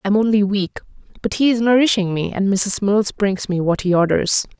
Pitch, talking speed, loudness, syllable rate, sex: 205 Hz, 220 wpm, -18 LUFS, 5.2 syllables/s, female